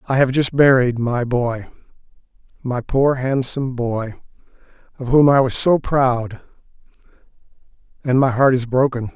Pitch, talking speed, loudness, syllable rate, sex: 125 Hz, 140 wpm, -17 LUFS, 4.3 syllables/s, male